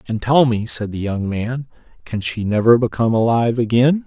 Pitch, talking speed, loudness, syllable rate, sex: 115 Hz, 190 wpm, -18 LUFS, 5.3 syllables/s, male